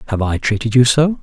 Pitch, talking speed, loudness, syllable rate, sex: 125 Hz, 245 wpm, -15 LUFS, 6.1 syllables/s, male